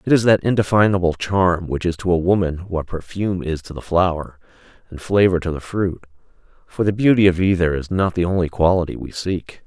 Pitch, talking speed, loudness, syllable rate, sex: 90 Hz, 205 wpm, -19 LUFS, 5.6 syllables/s, male